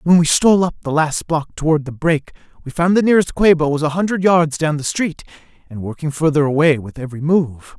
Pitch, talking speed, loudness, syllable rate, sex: 155 Hz, 215 wpm, -16 LUFS, 5.9 syllables/s, male